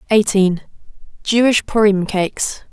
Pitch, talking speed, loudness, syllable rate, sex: 205 Hz, 65 wpm, -16 LUFS, 4.3 syllables/s, female